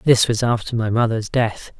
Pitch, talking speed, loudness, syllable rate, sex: 115 Hz, 200 wpm, -19 LUFS, 4.9 syllables/s, male